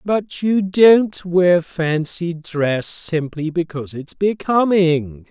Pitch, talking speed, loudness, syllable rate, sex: 170 Hz, 115 wpm, -18 LUFS, 3.1 syllables/s, male